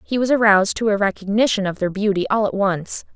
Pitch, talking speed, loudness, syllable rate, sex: 205 Hz, 230 wpm, -19 LUFS, 6.1 syllables/s, female